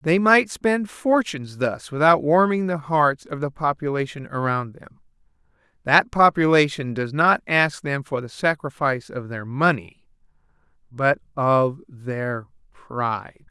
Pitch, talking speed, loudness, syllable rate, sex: 150 Hz, 130 wpm, -21 LUFS, 4.1 syllables/s, male